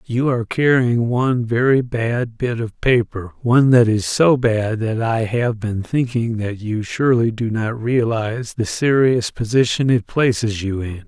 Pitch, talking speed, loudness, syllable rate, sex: 115 Hz, 170 wpm, -18 LUFS, 4.3 syllables/s, male